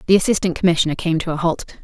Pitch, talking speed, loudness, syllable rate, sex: 170 Hz, 230 wpm, -18 LUFS, 7.4 syllables/s, female